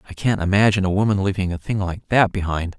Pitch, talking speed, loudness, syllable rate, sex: 95 Hz, 235 wpm, -20 LUFS, 6.6 syllables/s, male